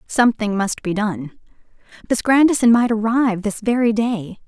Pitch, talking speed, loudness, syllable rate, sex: 225 Hz, 150 wpm, -18 LUFS, 5.0 syllables/s, female